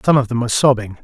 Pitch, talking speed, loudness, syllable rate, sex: 120 Hz, 290 wpm, -16 LUFS, 8.1 syllables/s, male